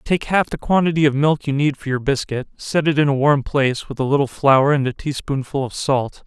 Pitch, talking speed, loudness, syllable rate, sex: 140 Hz, 250 wpm, -19 LUFS, 5.4 syllables/s, male